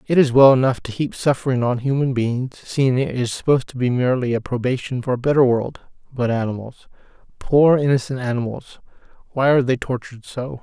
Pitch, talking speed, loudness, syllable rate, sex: 130 Hz, 175 wpm, -19 LUFS, 5.9 syllables/s, male